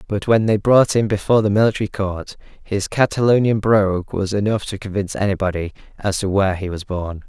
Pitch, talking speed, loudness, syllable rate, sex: 100 Hz, 190 wpm, -19 LUFS, 5.9 syllables/s, male